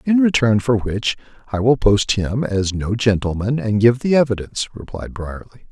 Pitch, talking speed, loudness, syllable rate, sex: 115 Hz, 180 wpm, -18 LUFS, 5.1 syllables/s, male